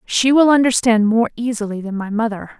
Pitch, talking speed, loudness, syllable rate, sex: 230 Hz, 185 wpm, -16 LUFS, 5.4 syllables/s, female